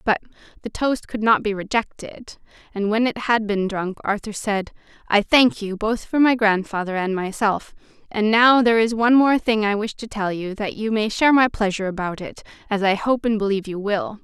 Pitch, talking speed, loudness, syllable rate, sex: 215 Hz, 215 wpm, -20 LUFS, 5.3 syllables/s, female